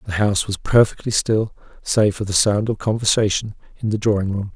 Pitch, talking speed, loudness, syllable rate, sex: 105 Hz, 200 wpm, -19 LUFS, 5.7 syllables/s, male